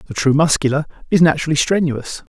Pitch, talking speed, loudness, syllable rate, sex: 150 Hz, 155 wpm, -16 LUFS, 6.5 syllables/s, male